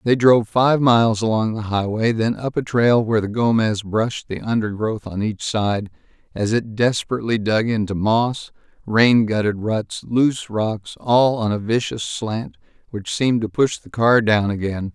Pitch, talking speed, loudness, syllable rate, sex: 110 Hz, 175 wpm, -19 LUFS, 4.6 syllables/s, male